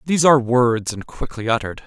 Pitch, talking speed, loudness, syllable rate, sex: 125 Hz, 195 wpm, -18 LUFS, 6.4 syllables/s, male